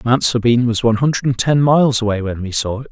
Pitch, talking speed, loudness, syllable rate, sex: 120 Hz, 245 wpm, -16 LUFS, 6.4 syllables/s, male